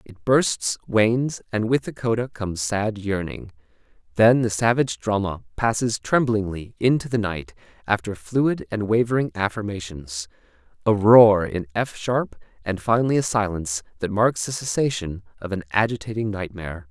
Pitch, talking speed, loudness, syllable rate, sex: 105 Hz, 145 wpm, -22 LUFS, 4.9 syllables/s, male